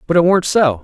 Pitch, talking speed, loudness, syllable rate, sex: 160 Hz, 290 wpm, -14 LUFS, 5.8 syllables/s, male